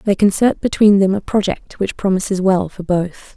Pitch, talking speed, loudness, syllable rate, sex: 195 Hz, 195 wpm, -16 LUFS, 4.8 syllables/s, female